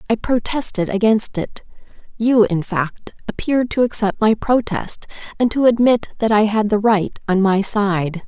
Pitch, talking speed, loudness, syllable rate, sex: 215 Hz, 165 wpm, -17 LUFS, 4.5 syllables/s, female